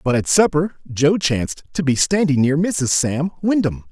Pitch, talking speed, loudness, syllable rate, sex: 155 Hz, 185 wpm, -18 LUFS, 4.5 syllables/s, male